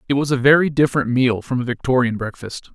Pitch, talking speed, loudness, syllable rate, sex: 130 Hz, 220 wpm, -18 LUFS, 6.3 syllables/s, male